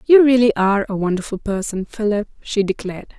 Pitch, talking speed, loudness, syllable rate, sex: 215 Hz, 170 wpm, -18 LUFS, 6.0 syllables/s, female